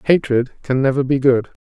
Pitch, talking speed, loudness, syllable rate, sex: 130 Hz, 185 wpm, -17 LUFS, 4.9 syllables/s, male